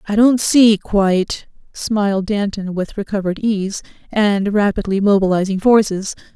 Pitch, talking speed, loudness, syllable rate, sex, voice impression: 200 Hz, 125 wpm, -16 LUFS, 4.6 syllables/s, female, feminine, adult-like, tensed, raspy, intellectual, lively, strict, sharp